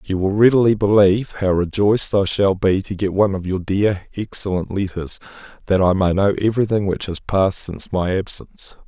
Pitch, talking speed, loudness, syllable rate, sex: 100 Hz, 195 wpm, -18 LUFS, 5.6 syllables/s, male